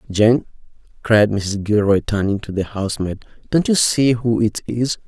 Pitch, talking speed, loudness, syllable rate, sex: 110 Hz, 165 wpm, -18 LUFS, 4.6 syllables/s, male